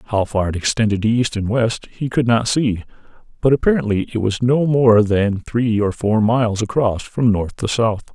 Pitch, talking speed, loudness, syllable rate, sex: 115 Hz, 200 wpm, -18 LUFS, 4.6 syllables/s, male